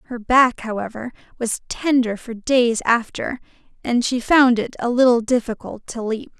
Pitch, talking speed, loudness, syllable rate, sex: 240 Hz, 160 wpm, -19 LUFS, 4.5 syllables/s, female